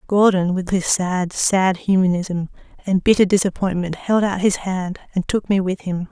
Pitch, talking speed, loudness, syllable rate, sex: 185 Hz, 175 wpm, -19 LUFS, 4.6 syllables/s, female